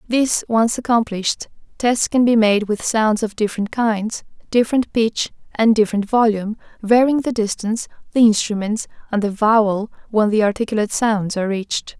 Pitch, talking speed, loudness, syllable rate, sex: 220 Hz, 155 wpm, -18 LUFS, 5.3 syllables/s, female